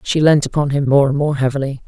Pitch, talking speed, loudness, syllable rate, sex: 140 Hz, 255 wpm, -16 LUFS, 6.3 syllables/s, female